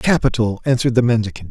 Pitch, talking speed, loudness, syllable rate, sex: 120 Hz, 160 wpm, -17 LUFS, 7.0 syllables/s, male